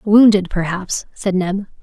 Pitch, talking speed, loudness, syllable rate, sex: 195 Hz, 130 wpm, -17 LUFS, 3.8 syllables/s, female